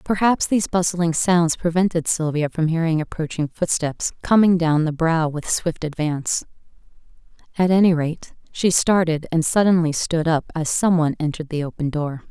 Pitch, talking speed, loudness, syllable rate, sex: 165 Hz, 160 wpm, -20 LUFS, 5.1 syllables/s, female